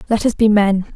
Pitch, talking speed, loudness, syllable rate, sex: 210 Hz, 250 wpm, -15 LUFS, 5.7 syllables/s, female